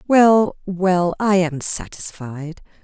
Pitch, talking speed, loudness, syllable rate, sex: 180 Hz, 105 wpm, -18 LUFS, 2.9 syllables/s, female